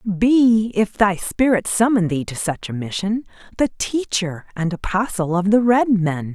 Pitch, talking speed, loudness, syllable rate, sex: 205 Hz, 170 wpm, -19 LUFS, 4.2 syllables/s, female